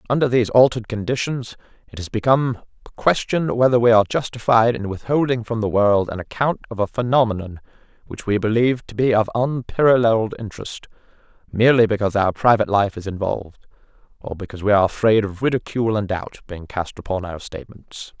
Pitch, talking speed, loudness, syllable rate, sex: 110 Hz, 170 wpm, -19 LUFS, 6.3 syllables/s, male